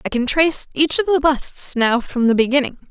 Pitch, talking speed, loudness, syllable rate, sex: 275 Hz, 225 wpm, -17 LUFS, 5.5 syllables/s, female